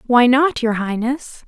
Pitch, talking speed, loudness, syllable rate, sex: 245 Hz, 165 wpm, -17 LUFS, 4.0 syllables/s, female